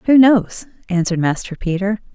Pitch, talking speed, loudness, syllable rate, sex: 195 Hz, 140 wpm, -17 LUFS, 5.5 syllables/s, female